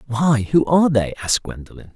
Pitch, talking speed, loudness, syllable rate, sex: 130 Hz, 185 wpm, -18 LUFS, 6.1 syllables/s, male